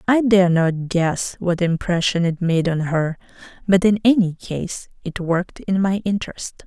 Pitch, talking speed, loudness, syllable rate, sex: 180 Hz, 170 wpm, -19 LUFS, 4.4 syllables/s, female